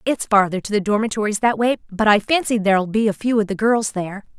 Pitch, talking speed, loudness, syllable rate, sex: 210 Hz, 235 wpm, -19 LUFS, 5.9 syllables/s, female